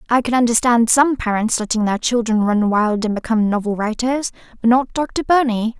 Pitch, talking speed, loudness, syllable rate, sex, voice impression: 230 Hz, 185 wpm, -17 LUFS, 5.3 syllables/s, female, feminine, adult-like, slightly thin, tensed, slightly weak, soft, intellectual, calm, friendly, reassuring, elegant, kind, modest